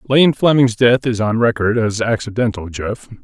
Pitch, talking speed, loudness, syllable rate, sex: 115 Hz, 165 wpm, -16 LUFS, 4.8 syllables/s, male